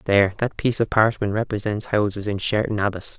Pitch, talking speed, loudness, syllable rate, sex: 105 Hz, 190 wpm, -22 LUFS, 6.0 syllables/s, male